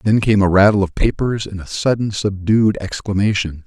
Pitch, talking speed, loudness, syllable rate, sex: 100 Hz, 180 wpm, -17 LUFS, 5.1 syllables/s, male